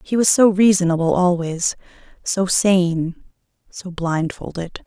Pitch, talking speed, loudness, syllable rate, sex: 180 Hz, 100 wpm, -18 LUFS, 3.9 syllables/s, female